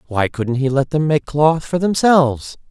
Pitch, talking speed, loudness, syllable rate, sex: 145 Hz, 200 wpm, -16 LUFS, 4.5 syllables/s, male